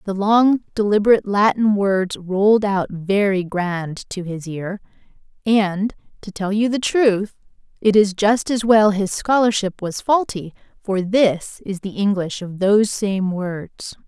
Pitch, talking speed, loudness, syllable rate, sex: 200 Hz, 155 wpm, -19 LUFS, 4.0 syllables/s, female